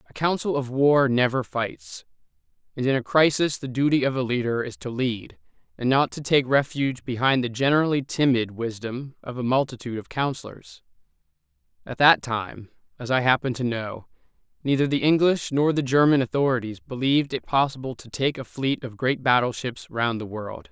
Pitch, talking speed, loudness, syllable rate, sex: 130 Hz, 175 wpm, -23 LUFS, 5.3 syllables/s, male